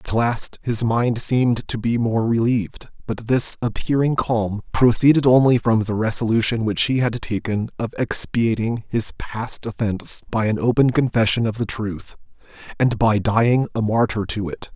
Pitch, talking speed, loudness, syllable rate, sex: 115 Hz, 165 wpm, -20 LUFS, 4.6 syllables/s, male